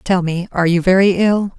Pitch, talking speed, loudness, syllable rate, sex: 185 Hz, 225 wpm, -15 LUFS, 5.3 syllables/s, female